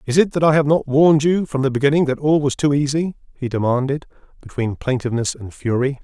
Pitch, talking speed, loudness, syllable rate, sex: 140 Hz, 220 wpm, -18 LUFS, 6.2 syllables/s, male